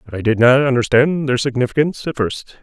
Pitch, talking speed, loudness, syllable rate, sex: 130 Hz, 205 wpm, -16 LUFS, 6.0 syllables/s, male